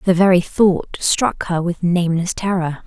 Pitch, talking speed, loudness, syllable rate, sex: 180 Hz, 170 wpm, -17 LUFS, 4.4 syllables/s, female